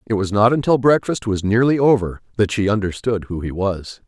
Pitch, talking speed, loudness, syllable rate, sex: 110 Hz, 205 wpm, -18 LUFS, 5.4 syllables/s, male